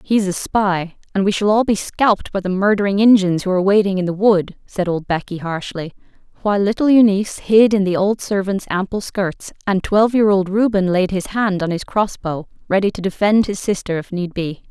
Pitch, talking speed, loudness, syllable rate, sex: 195 Hz, 220 wpm, -17 LUFS, 5.4 syllables/s, female